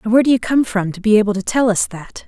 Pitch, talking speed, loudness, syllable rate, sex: 215 Hz, 340 wpm, -16 LUFS, 6.9 syllables/s, female